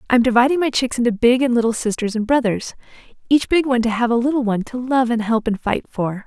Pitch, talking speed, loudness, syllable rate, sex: 240 Hz, 250 wpm, -18 LUFS, 6.4 syllables/s, female